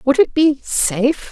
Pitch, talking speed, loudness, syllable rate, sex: 270 Hz, 135 wpm, -16 LUFS, 4.2 syllables/s, female